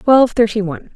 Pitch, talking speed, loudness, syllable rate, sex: 215 Hz, 190 wpm, -15 LUFS, 6.6 syllables/s, female